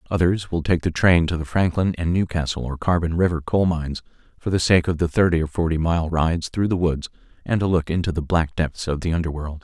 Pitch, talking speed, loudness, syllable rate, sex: 85 Hz, 235 wpm, -21 LUFS, 5.8 syllables/s, male